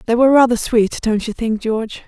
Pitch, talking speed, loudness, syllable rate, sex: 230 Hz, 230 wpm, -16 LUFS, 5.9 syllables/s, female